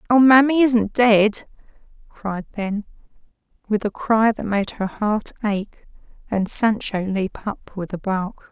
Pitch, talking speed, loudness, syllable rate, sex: 215 Hz, 155 wpm, -20 LUFS, 3.8 syllables/s, female